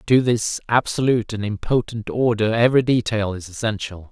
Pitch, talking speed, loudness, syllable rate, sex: 110 Hz, 145 wpm, -20 LUFS, 5.4 syllables/s, male